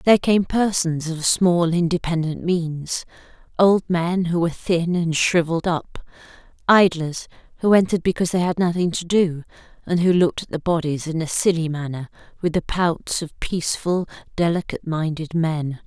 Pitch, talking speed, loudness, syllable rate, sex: 170 Hz, 160 wpm, -21 LUFS, 5.0 syllables/s, female